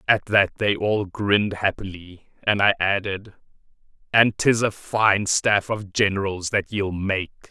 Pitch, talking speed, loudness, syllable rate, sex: 100 Hz, 150 wpm, -21 LUFS, 4.0 syllables/s, male